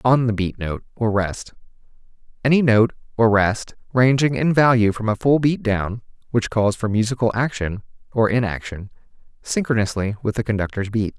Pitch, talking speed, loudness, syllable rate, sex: 115 Hz, 160 wpm, -20 LUFS, 5.3 syllables/s, male